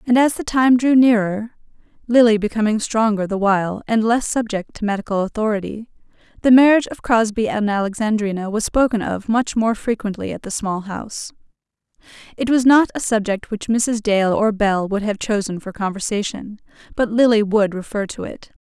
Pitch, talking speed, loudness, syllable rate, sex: 220 Hz, 165 wpm, -18 LUFS, 5.2 syllables/s, female